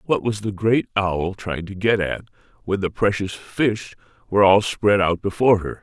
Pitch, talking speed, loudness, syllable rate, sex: 100 Hz, 195 wpm, -20 LUFS, 4.8 syllables/s, male